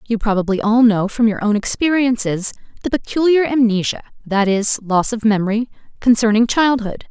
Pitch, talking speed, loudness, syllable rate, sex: 225 Hz, 150 wpm, -16 LUFS, 5.3 syllables/s, female